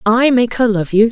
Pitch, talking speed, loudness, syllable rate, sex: 225 Hz, 270 wpm, -14 LUFS, 4.7 syllables/s, female